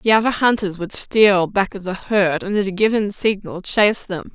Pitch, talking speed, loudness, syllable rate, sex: 200 Hz, 220 wpm, -18 LUFS, 4.9 syllables/s, female